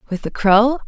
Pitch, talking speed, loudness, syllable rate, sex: 225 Hz, 205 wpm, -15 LUFS, 4.8 syllables/s, female